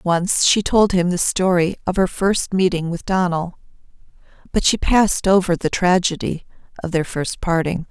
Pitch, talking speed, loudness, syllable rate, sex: 180 Hz, 160 wpm, -18 LUFS, 4.6 syllables/s, female